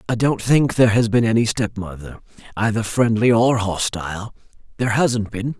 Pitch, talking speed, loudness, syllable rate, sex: 110 Hz, 160 wpm, -19 LUFS, 5.2 syllables/s, male